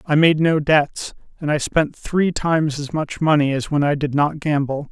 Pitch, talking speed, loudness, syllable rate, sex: 150 Hz, 220 wpm, -19 LUFS, 4.6 syllables/s, male